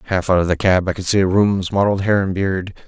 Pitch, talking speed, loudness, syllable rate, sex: 95 Hz, 270 wpm, -17 LUFS, 5.5 syllables/s, male